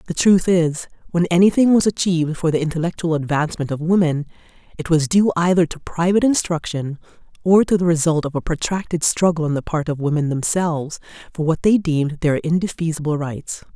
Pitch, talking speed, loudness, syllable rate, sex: 165 Hz, 180 wpm, -19 LUFS, 5.8 syllables/s, female